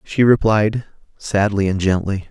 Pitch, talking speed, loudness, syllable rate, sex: 100 Hz, 130 wpm, -17 LUFS, 4.4 syllables/s, male